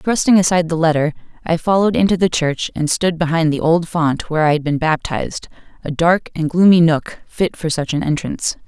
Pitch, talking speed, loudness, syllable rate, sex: 165 Hz, 210 wpm, -16 LUFS, 5.6 syllables/s, female